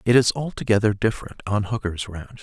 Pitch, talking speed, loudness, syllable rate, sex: 105 Hz, 175 wpm, -23 LUFS, 6.1 syllables/s, male